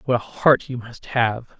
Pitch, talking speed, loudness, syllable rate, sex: 120 Hz, 225 wpm, -20 LUFS, 4.2 syllables/s, male